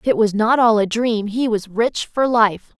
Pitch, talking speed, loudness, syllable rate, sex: 220 Hz, 255 wpm, -18 LUFS, 4.4 syllables/s, female